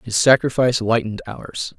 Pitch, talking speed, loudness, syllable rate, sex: 120 Hz, 135 wpm, -18 LUFS, 5.6 syllables/s, male